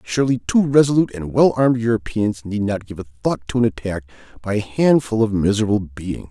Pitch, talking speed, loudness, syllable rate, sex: 110 Hz, 200 wpm, -19 LUFS, 6.1 syllables/s, male